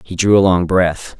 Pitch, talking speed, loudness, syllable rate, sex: 90 Hz, 250 wpm, -14 LUFS, 4.6 syllables/s, male